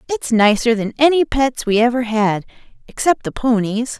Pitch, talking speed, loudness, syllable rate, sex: 235 Hz, 165 wpm, -17 LUFS, 4.9 syllables/s, female